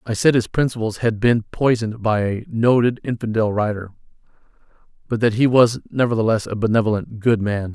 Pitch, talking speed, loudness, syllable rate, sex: 115 Hz, 165 wpm, -19 LUFS, 5.5 syllables/s, male